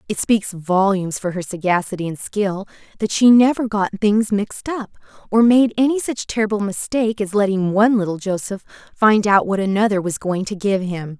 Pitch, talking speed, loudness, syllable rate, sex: 205 Hz, 190 wpm, -18 LUFS, 5.4 syllables/s, female